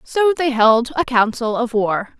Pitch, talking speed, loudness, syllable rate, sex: 250 Hz, 190 wpm, -17 LUFS, 4.0 syllables/s, female